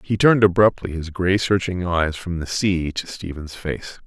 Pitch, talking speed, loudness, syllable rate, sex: 90 Hz, 190 wpm, -21 LUFS, 4.6 syllables/s, male